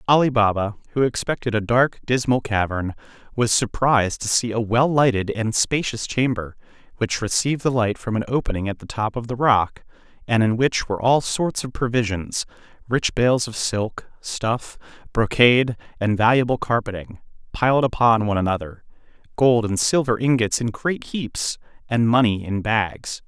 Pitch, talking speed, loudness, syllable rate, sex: 115 Hz, 160 wpm, -21 LUFS, 4.9 syllables/s, male